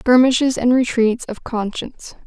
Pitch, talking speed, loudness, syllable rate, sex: 240 Hz, 130 wpm, -18 LUFS, 4.7 syllables/s, female